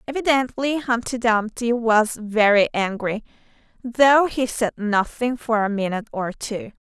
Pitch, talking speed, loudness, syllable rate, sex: 230 Hz, 130 wpm, -21 LUFS, 4.2 syllables/s, female